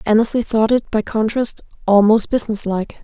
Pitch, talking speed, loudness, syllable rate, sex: 220 Hz, 140 wpm, -17 LUFS, 5.8 syllables/s, female